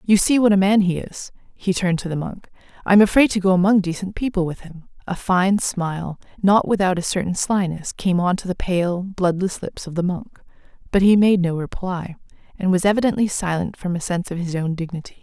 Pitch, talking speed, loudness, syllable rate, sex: 185 Hz, 210 wpm, -20 LUFS, 5.6 syllables/s, female